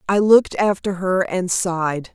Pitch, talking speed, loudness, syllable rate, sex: 185 Hz, 170 wpm, -18 LUFS, 4.5 syllables/s, female